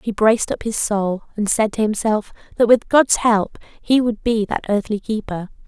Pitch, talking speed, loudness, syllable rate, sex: 215 Hz, 200 wpm, -19 LUFS, 4.6 syllables/s, female